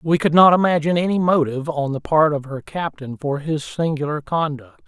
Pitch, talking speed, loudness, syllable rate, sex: 155 Hz, 195 wpm, -19 LUFS, 5.4 syllables/s, male